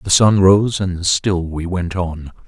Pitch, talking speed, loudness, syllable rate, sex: 90 Hz, 195 wpm, -16 LUFS, 3.6 syllables/s, male